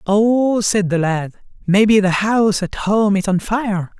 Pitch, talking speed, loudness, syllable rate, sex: 205 Hz, 180 wpm, -16 LUFS, 4.0 syllables/s, male